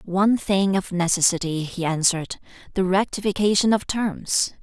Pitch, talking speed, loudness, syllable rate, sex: 190 Hz, 115 wpm, -22 LUFS, 5.0 syllables/s, female